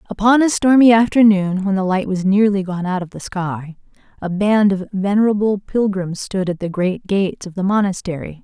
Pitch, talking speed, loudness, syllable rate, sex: 195 Hz, 190 wpm, -17 LUFS, 5.2 syllables/s, female